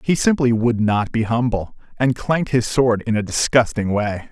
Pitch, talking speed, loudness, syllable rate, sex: 120 Hz, 195 wpm, -19 LUFS, 4.8 syllables/s, male